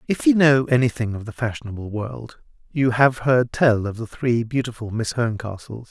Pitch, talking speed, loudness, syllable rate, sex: 120 Hz, 185 wpm, -21 LUFS, 4.9 syllables/s, male